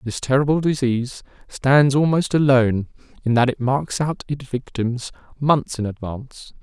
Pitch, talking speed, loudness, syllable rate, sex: 130 Hz, 145 wpm, -20 LUFS, 4.8 syllables/s, male